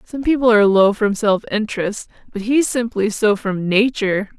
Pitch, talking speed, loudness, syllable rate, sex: 215 Hz, 180 wpm, -17 LUFS, 5.0 syllables/s, female